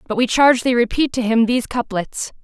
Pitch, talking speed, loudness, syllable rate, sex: 240 Hz, 220 wpm, -17 LUFS, 5.9 syllables/s, female